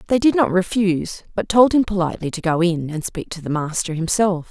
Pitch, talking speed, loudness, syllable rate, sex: 185 Hz, 225 wpm, -19 LUFS, 5.7 syllables/s, female